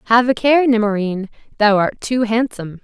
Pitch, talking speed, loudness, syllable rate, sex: 225 Hz, 170 wpm, -16 LUFS, 5.2 syllables/s, female